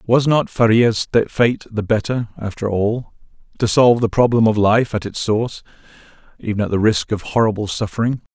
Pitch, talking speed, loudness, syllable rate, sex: 110 Hz, 165 wpm, -18 LUFS, 5.3 syllables/s, male